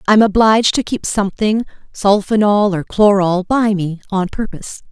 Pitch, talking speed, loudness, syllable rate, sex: 205 Hz, 160 wpm, -15 LUFS, 5.1 syllables/s, female